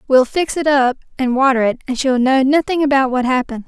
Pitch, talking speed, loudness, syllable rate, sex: 265 Hz, 230 wpm, -16 LUFS, 5.9 syllables/s, female